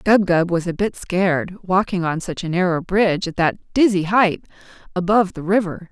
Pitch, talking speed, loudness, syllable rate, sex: 185 Hz, 195 wpm, -19 LUFS, 5.1 syllables/s, female